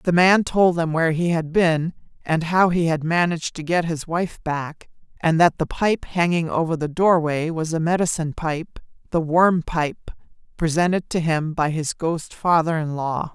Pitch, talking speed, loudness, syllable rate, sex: 165 Hz, 180 wpm, -21 LUFS, 4.5 syllables/s, female